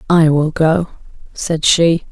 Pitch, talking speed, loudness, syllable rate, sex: 160 Hz, 140 wpm, -14 LUFS, 3.4 syllables/s, female